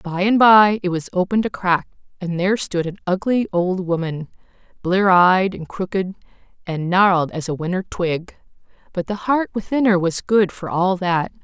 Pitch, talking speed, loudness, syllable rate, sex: 185 Hz, 185 wpm, -19 LUFS, 4.8 syllables/s, female